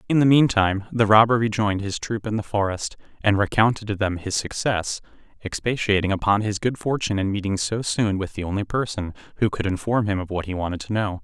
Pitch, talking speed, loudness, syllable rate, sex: 105 Hz, 215 wpm, -22 LUFS, 6.0 syllables/s, male